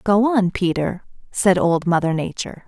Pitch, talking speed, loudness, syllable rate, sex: 185 Hz, 155 wpm, -19 LUFS, 4.7 syllables/s, female